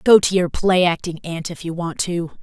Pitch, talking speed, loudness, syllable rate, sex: 175 Hz, 250 wpm, -19 LUFS, 4.9 syllables/s, female